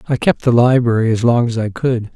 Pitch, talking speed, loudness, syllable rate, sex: 120 Hz, 250 wpm, -15 LUFS, 5.6 syllables/s, male